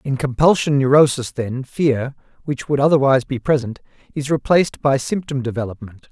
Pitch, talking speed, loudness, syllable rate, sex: 135 Hz, 145 wpm, -18 LUFS, 5.4 syllables/s, male